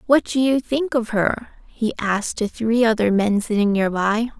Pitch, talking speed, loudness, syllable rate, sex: 225 Hz, 190 wpm, -20 LUFS, 4.6 syllables/s, female